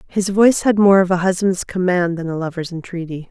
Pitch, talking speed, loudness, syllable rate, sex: 180 Hz, 220 wpm, -17 LUFS, 5.7 syllables/s, female